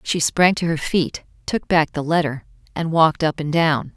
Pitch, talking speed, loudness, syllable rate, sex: 160 Hz, 210 wpm, -19 LUFS, 4.8 syllables/s, female